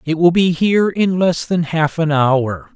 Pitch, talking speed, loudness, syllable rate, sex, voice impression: 165 Hz, 220 wpm, -16 LUFS, 4.2 syllables/s, male, masculine, adult-like, clear, slightly refreshing, slightly unique, slightly lively